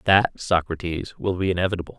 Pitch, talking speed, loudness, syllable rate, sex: 90 Hz, 150 wpm, -23 LUFS, 6.2 syllables/s, male